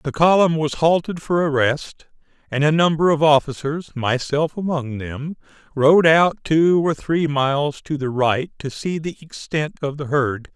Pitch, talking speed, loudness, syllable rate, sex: 150 Hz, 175 wpm, -19 LUFS, 4.2 syllables/s, male